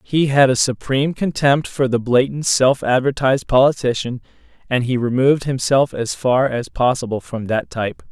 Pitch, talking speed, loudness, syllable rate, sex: 130 Hz, 165 wpm, -18 LUFS, 5.1 syllables/s, male